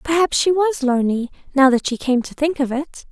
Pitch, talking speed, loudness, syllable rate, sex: 280 Hz, 230 wpm, -18 LUFS, 5.5 syllables/s, female